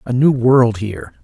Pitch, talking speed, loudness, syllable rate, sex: 125 Hz, 195 wpm, -14 LUFS, 4.9 syllables/s, male